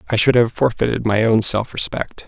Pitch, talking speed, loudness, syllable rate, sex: 115 Hz, 210 wpm, -17 LUFS, 5.3 syllables/s, male